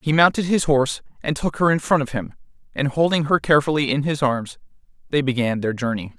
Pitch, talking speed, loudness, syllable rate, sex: 145 Hz, 215 wpm, -20 LUFS, 6.1 syllables/s, male